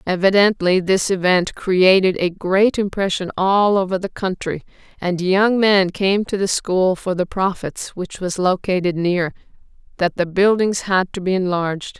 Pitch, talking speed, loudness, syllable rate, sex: 185 Hz, 160 wpm, -18 LUFS, 4.3 syllables/s, female